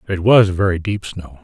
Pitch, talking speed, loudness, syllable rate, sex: 95 Hz, 250 wpm, -16 LUFS, 5.6 syllables/s, male